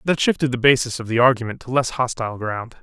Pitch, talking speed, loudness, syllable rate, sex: 120 Hz, 235 wpm, -20 LUFS, 6.3 syllables/s, male